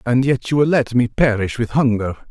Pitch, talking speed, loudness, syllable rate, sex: 120 Hz, 235 wpm, -17 LUFS, 5.3 syllables/s, male